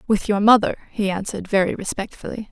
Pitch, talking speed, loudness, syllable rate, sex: 205 Hz, 165 wpm, -20 LUFS, 6.3 syllables/s, female